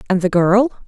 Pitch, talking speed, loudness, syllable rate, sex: 200 Hz, 205 wpm, -15 LUFS, 5.4 syllables/s, female